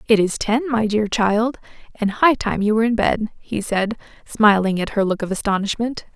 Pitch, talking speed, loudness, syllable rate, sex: 215 Hz, 205 wpm, -19 LUFS, 5.0 syllables/s, female